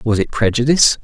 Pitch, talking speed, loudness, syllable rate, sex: 120 Hz, 175 wpm, -15 LUFS, 6.5 syllables/s, male